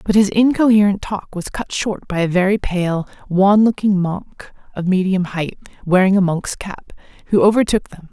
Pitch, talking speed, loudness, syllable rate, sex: 190 Hz, 175 wpm, -17 LUFS, 4.7 syllables/s, female